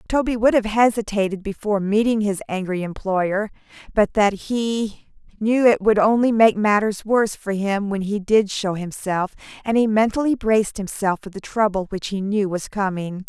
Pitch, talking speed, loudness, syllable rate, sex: 210 Hz, 175 wpm, -20 LUFS, 4.9 syllables/s, female